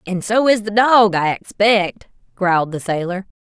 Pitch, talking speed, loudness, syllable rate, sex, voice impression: 200 Hz, 175 wpm, -16 LUFS, 4.5 syllables/s, female, feminine, adult-like, tensed, powerful, bright, clear, intellectual, calm, friendly, elegant, lively, slightly intense